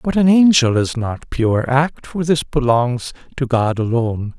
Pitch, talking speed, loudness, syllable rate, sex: 130 Hz, 180 wpm, -17 LUFS, 4.2 syllables/s, male